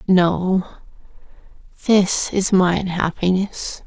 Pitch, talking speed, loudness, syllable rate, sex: 185 Hz, 80 wpm, -19 LUFS, 3.3 syllables/s, female